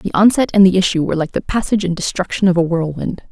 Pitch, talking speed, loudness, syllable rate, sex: 185 Hz, 255 wpm, -16 LUFS, 6.8 syllables/s, female